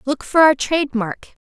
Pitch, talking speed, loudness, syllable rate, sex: 275 Hz, 205 wpm, -17 LUFS, 4.8 syllables/s, female